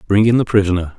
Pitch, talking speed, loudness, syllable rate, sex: 100 Hz, 245 wpm, -15 LUFS, 7.2 syllables/s, male